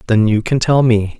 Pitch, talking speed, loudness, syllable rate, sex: 115 Hz, 250 wpm, -14 LUFS, 5.0 syllables/s, male